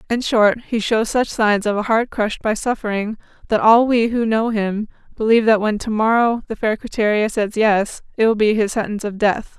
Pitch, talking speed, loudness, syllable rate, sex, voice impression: 220 Hz, 220 wpm, -18 LUFS, 5.3 syllables/s, female, feminine, slightly adult-like, slightly muffled, calm, friendly, slightly reassuring, slightly kind